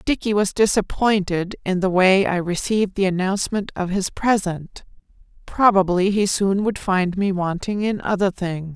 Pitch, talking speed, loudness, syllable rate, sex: 195 Hz, 160 wpm, -20 LUFS, 4.7 syllables/s, female